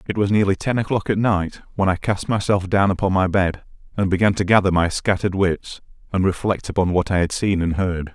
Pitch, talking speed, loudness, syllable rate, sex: 95 Hz, 230 wpm, -20 LUFS, 5.7 syllables/s, male